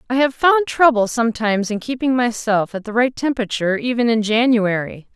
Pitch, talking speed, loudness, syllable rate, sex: 235 Hz, 175 wpm, -18 LUFS, 5.7 syllables/s, female